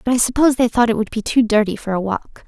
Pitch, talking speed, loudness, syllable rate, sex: 230 Hz, 315 wpm, -17 LUFS, 6.8 syllables/s, female